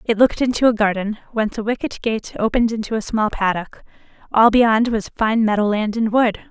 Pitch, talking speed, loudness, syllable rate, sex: 220 Hz, 205 wpm, -18 LUFS, 5.7 syllables/s, female